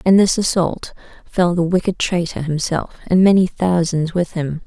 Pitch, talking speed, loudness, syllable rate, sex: 175 Hz, 165 wpm, -17 LUFS, 4.6 syllables/s, female